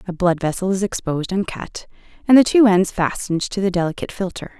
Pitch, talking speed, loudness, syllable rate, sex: 190 Hz, 210 wpm, -19 LUFS, 6.2 syllables/s, female